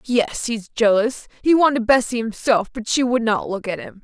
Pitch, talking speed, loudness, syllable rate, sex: 230 Hz, 195 wpm, -19 LUFS, 4.8 syllables/s, female